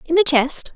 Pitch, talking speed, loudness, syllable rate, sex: 310 Hz, 235 wpm, -18 LUFS, 4.6 syllables/s, female